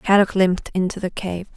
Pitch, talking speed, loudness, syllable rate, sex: 190 Hz, 190 wpm, -21 LUFS, 5.6 syllables/s, female